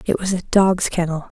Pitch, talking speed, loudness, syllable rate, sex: 180 Hz, 215 wpm, -19 LUFS, 5.0 syllables/s, female